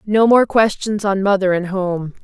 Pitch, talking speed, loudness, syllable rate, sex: 200 Hz, 190 wpm, -16 LUFS, 4.3 syllables/s, female